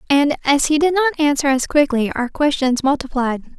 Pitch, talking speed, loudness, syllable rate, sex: 280 Hz, 185 wpm, -17 LUFS, 5.1 syllables/s, female